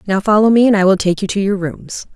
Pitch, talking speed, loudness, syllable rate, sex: 200 Hz, 305 wpm, -14 LUFS, 6.1 syllables/s, female